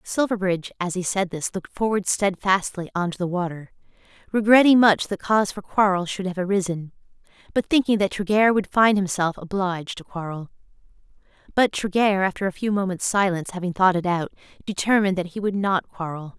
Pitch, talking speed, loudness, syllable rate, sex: 190 Hz, 175 wpm, -22 LUFS, 5.8 syllables/s, female